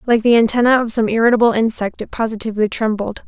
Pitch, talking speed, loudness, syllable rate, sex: 225 Hz, 185 wpm, -16 LUFS, 6.8 syllables/s, female